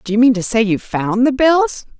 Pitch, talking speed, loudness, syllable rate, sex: 240 Hz, 270 wpm, -15 LUFS, 5.1 syllables/s, female